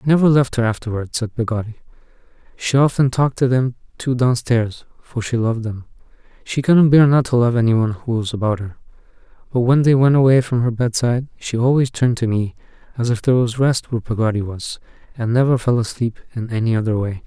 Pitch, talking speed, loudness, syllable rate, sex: 120 Hz, 200 wpm, -18 LUFS, 6.0 syllables/s, male